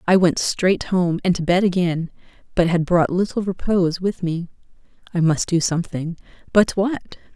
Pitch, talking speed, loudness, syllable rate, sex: 180 Hz, 155 wpm, -20 LUFS, 4.9 syllables/s, female